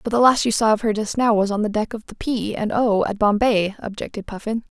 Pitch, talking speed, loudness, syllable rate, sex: 215 Hz, 280 wpm, -20 LUFS, 5.8 syllables/s, female